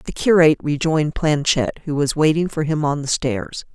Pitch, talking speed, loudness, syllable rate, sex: 150 Hz, 190 wpm, -19 LUFS, 5.3 syllables/s, female